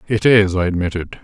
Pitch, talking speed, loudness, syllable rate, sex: 95 Hz, 195 wpm, -16 LUFS, 5.6 syllables/s, male